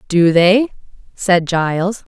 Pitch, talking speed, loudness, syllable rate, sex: 185 Hz, 110 wpm, -15 LUFS, 3.4 syllables/s, female